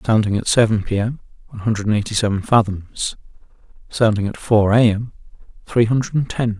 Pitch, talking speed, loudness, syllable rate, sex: 110 Hz, 165 wpm, -18 LUFS, 5.5 syllables/s, male